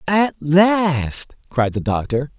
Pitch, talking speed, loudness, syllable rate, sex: 155 Hz, 125 wpm, -18 LUFS, 2.9 syllables/s, male